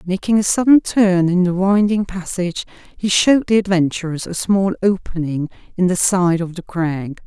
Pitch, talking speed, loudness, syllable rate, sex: 185 Hz, 175 wpm, -17 LUFS, 5.0 syllables/s, female